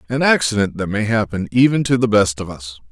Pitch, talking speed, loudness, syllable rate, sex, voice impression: 110 Hz, 225 wpm, -17 LUFS, 5.9 syllables/s, male, masculine, adult-like, tensed, powerful, clear, mature, friendly, slightly reassuring, wild, lively, slightly strict